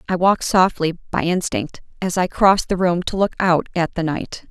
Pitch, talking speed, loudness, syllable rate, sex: 180 Hz, 215 wpm, -19 LUFS, 5.4 syllables/s, female